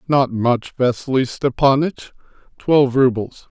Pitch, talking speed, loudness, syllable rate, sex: 130 Hz, 85 wpm, -18 LUFS, 4.2 syllables/s, male